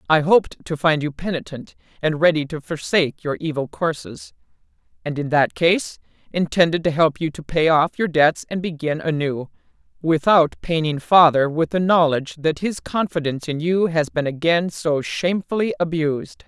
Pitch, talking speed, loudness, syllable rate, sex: 160 Hz, 170 wpm, -20 LUFS, 5.0 syllables/s, female